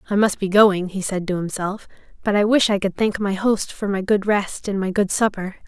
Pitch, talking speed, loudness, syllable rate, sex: 200 Hz, 255 wpm, -20 LUFS, 5.2 syllables/s, female